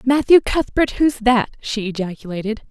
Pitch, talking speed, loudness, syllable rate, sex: 235 Hz, 135 wpm, -18 LUFS, 5.0 syllables/s, female